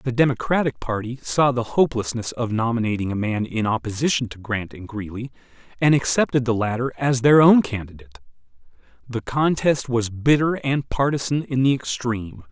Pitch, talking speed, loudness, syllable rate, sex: 125 Hz, 160 wpm, -21 LUFS, 5.4 syllables/s, male